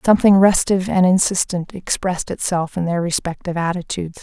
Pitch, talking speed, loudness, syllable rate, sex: 180 Hz, 140 wpm, -18 LUFS, 6.1 syllables/s, female